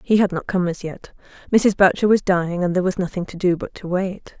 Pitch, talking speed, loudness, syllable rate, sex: 185 Hz, 260 wpm, -20 LUFS, 5.9 syllables/s, female